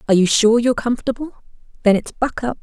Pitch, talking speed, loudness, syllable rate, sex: 230 Hz, 205 wpm, -18 LUFS, 7.4 syllables/s, female